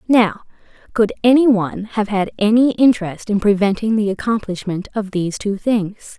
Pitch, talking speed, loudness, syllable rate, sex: 210 Hz, 155 wpm, -17 LUFS, 5.1 syllables/s, female